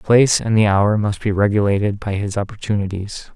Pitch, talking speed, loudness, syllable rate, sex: 105 Hz, 195 wpm, -18 LUFS, 5.7 syllables/s, male